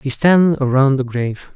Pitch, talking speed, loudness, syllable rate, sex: 140 Hz, 195 wpm, -15 LUFS, 4.9 syllables/s, male